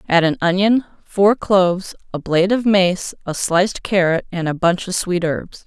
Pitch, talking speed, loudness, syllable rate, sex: 185 Hz, 190 wpm, -17 LUFS, 4.6 syllables/s, female